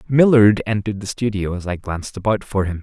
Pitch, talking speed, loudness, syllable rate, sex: 105 Hz, 210 wpm, -19 LUFS, 6.1 syllables/s, male